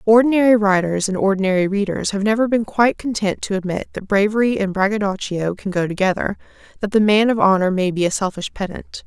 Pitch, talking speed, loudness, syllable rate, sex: 200 Hz, 190 wpm, -18 LUFS, 6.0 syllables/s, female